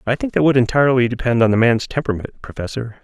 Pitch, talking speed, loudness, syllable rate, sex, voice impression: 125 Hz, 220 wpm, -17 LUFS, 7.4 syllables/s, male, masculine, middle-aged, tensed, powerful, bright, slightly hard, slightly muffled, mature, friendly, slightly reassuring, wild, lively, strict, intense